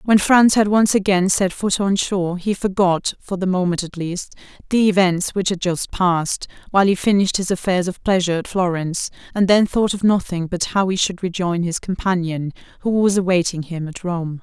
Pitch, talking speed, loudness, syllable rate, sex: 185 Hz, 205 wpm, -19 LUFS, 5.3 syllables/s, female